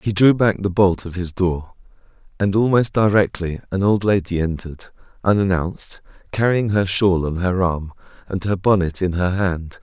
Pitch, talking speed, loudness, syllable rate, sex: 95 Hz, 170 wpm, -19 LUFS, 4.8 syllables/s, male